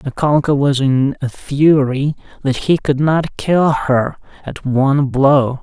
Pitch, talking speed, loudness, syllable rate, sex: 140 Hz, 150 wpm, -15 LUFS, 3.6 syllables/s, male